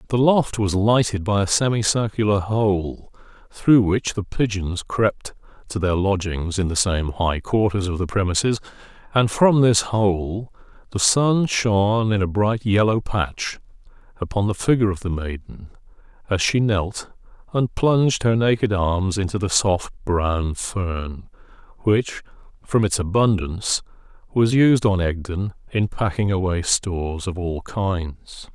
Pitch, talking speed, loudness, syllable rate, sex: 100 Hz, 145 wpm, -21 LUFS, 4.1 syllables/s, male